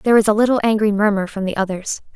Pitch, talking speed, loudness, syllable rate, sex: 210 Hz, 250 wpm, -18 LUFS, 7.0 syllables/s, female